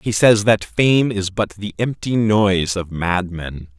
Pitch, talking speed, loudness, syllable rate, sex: 100 Hz, 175 wpm, -18 LUFS, 3.8 syllables/s, male